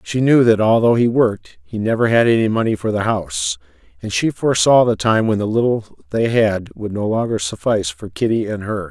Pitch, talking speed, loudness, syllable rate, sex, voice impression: 115 Hz, 215 wpm, -17 LUFS, 5.6 syllables/s, male, very masculine, very middle-aged, very thick, tensed, powerful, slightly dark, slightly hard, slightly muffled, fluent, raspy, cool, slightly intellectual, slightly refreshing, sincere, calm, very mature, friendly, reassuring, unique, slightly elegant, wild, slightly sweet, slightly lively, strict